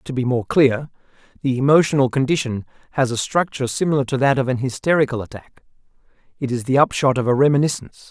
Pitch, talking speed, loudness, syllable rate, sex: 135 Hz, 180 wpm, -19 LUFS, 6.5 syllables/s, male